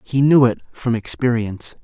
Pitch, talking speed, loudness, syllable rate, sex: 120 Hz, 165 wpm, -18 LUFS, 5.2 syllables/s, male